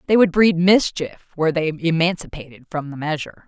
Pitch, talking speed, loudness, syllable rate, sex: 165 Hz, 170 wpm, -19 LUFS, 5.7 syllables/s, female